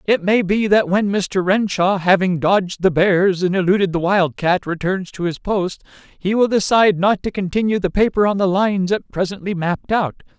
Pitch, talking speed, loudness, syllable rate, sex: 190 Hz, 195 wpm, -18 LUFS, 5.0 syllables/s, male